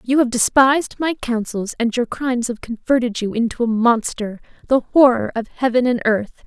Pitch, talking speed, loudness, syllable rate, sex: 240 Hz, 185 wpm, -18 LUFS, 5.1 syllables/s, female